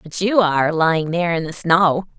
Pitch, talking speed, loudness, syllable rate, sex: 170 Hz, 220 wpm, -17 LUFS, 5.5 syllables/s, female